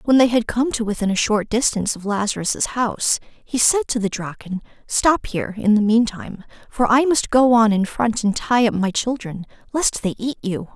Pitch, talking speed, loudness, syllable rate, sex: 225 Hz, 210 wpm, -19 LUFS, 5.0 syllables/s, female